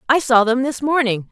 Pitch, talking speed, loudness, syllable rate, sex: 250 Hz, 230 wpm, -17 LUFS, 5.3 syllables/s, female